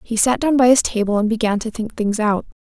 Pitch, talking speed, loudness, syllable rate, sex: 225 Hz, 270 wpm, -18 LUFS, 5.9 syllables/s, female